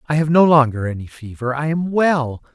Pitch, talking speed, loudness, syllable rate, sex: 145 Hz, 210 wpm, -17 LUFS, 5.1 syllables/s, male